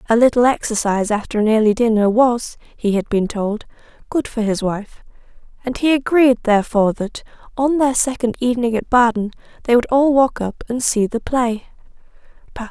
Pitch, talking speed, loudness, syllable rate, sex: 230 Hz, 170 wpm, -17 LUFS, 5.3 syllables/s, female